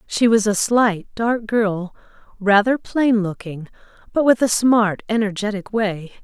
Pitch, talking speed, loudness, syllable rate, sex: 215 Hz, 145 wpm, -19 LUFS, 4.0 syllables/s, female